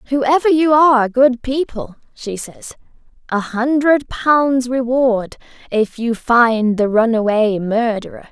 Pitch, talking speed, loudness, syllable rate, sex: 245 Hz, 125 wpm, -16 LUFS, 3.9 syllables/s, female